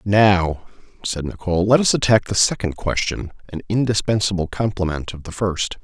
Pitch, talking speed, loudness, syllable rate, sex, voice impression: 95 Hz, 155 wpm, -19 LUFS, 4.9 syllables/s, male, masculine, middle-aged, slightly powerful, clear, fluent, intellectual, calm, mature, wild, lively, slightly strict, slightly sharp